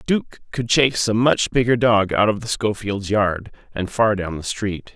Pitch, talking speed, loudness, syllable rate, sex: 110 Hz, 205 wpm, -20 LUFS, 4.5 syllables/s, male